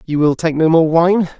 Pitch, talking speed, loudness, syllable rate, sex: 165 Hz, 260 wpm, -14 LUFS, 4.9 syllables/s, male